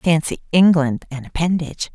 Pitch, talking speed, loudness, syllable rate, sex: 160 Hz, 125 wpm, -18 LUFS, 5.2 syllables/s, female